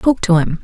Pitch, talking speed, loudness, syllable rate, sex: 185 Hz, 285 wpm, -15 LUFS, 5.1 syllables/s, female